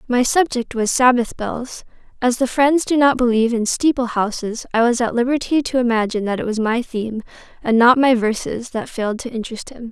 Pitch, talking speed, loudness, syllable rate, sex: 240 Hz, 205 wpm, -18 LUFS, 5.7 syllables/s, female